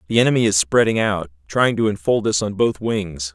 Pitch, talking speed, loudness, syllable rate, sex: 100 Hz, 215 wpm, -19 LUFS, 5.3 syllables/s, male